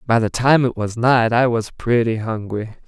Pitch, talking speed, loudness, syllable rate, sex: 115 Hz, 210 wpm, -18 LUFS, 4.6 syllables/s, male